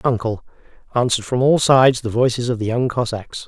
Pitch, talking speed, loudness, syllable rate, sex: 120 Hz, 190 wpm, -18 LUFS, 5.9 syllables/s, male